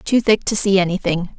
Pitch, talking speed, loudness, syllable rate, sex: 195 Hz, 215 wpm, -17 LUFS, 5.2 syllables/s, female